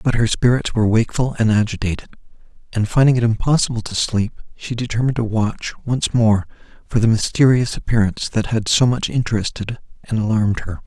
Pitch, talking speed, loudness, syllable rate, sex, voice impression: 115 Hz, 170 wpm, -18 LUFS, 5.8 syllables/s, male, masculine, slightly gender-neutral, slightly young, slightly adult-like, slightly thick, very relaxed, weak, very dark, very soft, very muffled, fluent, slightly raspy, very cool, intellectual, slightly refreshing, very sincere, very calm, slightly mature, friendly, very reassuring, slightly unique, very elegant, slightly wild, very sweet, very kind, very modest